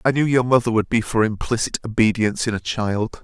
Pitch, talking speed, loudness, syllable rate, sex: 115 Hz, 225 wpm, -20 LUFS, 5.9 syllables/s, male